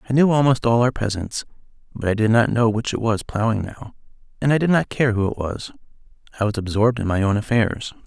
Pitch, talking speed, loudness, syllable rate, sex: 115 Hz, 230 wpm, -20 LUFS, 6.0 syllables/s, male